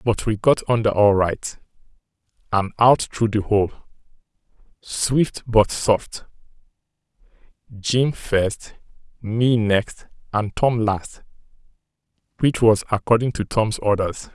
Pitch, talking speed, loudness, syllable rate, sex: 110 Hz, 115 wpm, -20 LUFS, 3.5 syllables/s, male